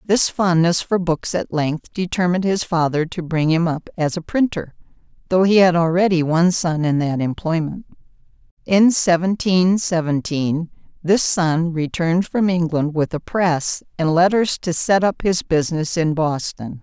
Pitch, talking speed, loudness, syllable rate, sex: 170 Hz, 160 wpm, -19 LUFS, 4.5 syllables/s, female